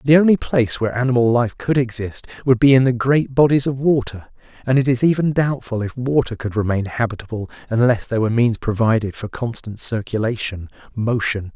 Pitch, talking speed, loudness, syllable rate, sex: 120 Hz, 175 wpm, -19 LUFS, 5.8 syllables/s, male